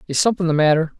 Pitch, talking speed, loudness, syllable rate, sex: 165 Hz, 240 wpm, -18 LUFS, 8.6 syllables/s, male